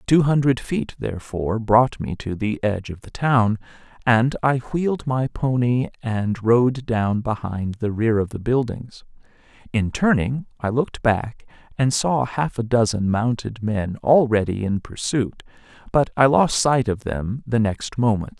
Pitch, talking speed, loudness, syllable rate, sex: 120 Hz, 165 wpm, -21 LUFS, 4.2 syllables/s, male